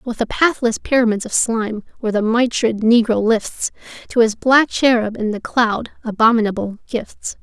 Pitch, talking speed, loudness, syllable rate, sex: 230 Hz, 160 wpm, -17 LUFS, 4.8 syllables/s, female